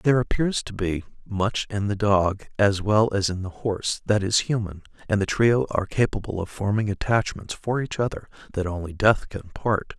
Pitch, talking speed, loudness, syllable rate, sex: 105 Hz, 200 wpm, -24 LUFS, 5.0 syllables/s, male